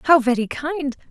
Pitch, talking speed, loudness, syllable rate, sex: 280 Hz, 165 wpm, -20 LUFS, 4.8 syllables/s, female